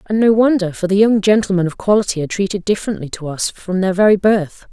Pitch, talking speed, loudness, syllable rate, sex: 195 Hz, 230 wpm, -16 LUFS, 6.4 syllables/s, female